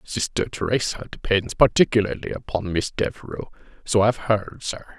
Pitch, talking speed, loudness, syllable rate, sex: 105 Hz, 120 wpm, -23 LUFS, 5.8 syllables/s, male